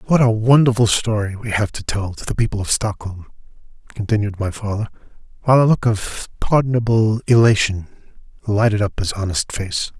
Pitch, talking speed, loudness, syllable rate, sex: 110 Hz, 160 wpm, -18 LUFS, 5.3 syllables/s, male